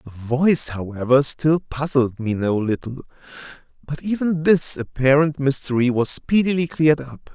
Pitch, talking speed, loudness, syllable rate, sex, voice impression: 140 Hz, 140 wpm, -19 LUFS, 4.7 syllables/s, male, very masculine, very adult-like, slightly old, very thick, tensed, very powerful, bright, slightly hard, slightly clear, fluent, slightly raspy, very cool, intellectual, refreshing, sincere, very calm, mature, very friendly, reassuring, very unique, slightly elegant, wild, sweet, lively, kind, slightly strict, slightly intense